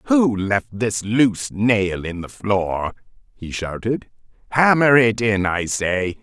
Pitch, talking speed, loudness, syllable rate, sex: 110 Hz, 145 wpm, -19 LUFS, 3.6 syllables/s, male